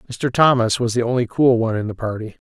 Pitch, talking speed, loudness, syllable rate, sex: 120 Hz, 245 wpm, -18 LUFS, 6.4 syllables/s, male